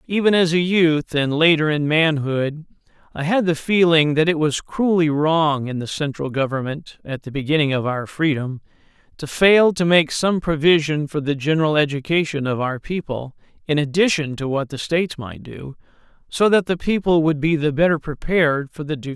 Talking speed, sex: 195 wpm, male